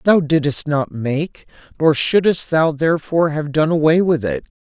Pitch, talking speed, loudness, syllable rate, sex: 155 Hz, 170 wpm, -17 LUFS, 4.2 syllables/s, male